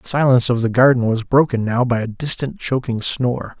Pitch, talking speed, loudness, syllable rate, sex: 125 Hz, 215 wpm, -17 LUFS, 5.6 syllables/s, male